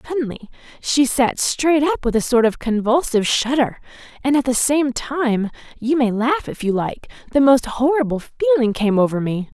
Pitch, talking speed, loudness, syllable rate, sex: 250 Hz, 170 wpm, -18 LUFS, 4.8 syllables/s, female